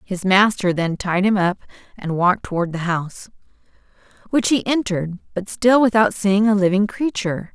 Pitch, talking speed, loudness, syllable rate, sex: 195 Hz, 165 wpm, -19 LUFS, 5.2 syllables/s, female